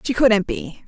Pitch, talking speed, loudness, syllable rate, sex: 225 Hz, 205 wpm, -19 LUFS, 3.9 syllables/s, female